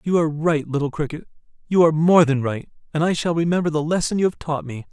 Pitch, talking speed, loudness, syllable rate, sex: 155 Hz, 245 wpm, -20 LUFS, 6.6 syllables/s, male